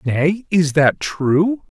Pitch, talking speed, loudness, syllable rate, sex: 165 Hz, 135 wpm, -17 LUFS, 2.7 syllables/s, male